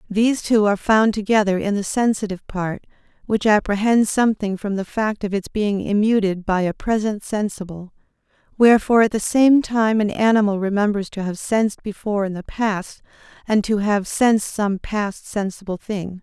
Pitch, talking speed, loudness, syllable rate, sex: 205 Hz, 170 wpm, -19 LUFS, 5.2 syllables/s, female